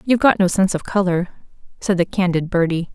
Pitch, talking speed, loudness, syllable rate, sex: 185 Hz, 205 wpm, -18 LUFS, 6.2 syllables/s, female